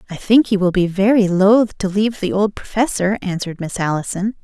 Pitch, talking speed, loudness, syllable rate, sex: 195 Hz, 205 wpm, -17 LUFS, 5.6 syllables/s, female